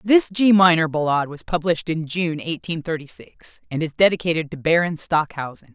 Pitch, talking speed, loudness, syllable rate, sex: 165 Hz, 180 wpm, -20 LUFS, 5.4 syllables/s, female